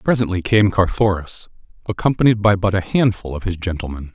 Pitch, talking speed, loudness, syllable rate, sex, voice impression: 100 Hz, 160 wpm, -18 LUFS, 5.7 syllables/s, male, masculine, very adult-like, slightly dark, calm, reassuring, elegant, sweet, kind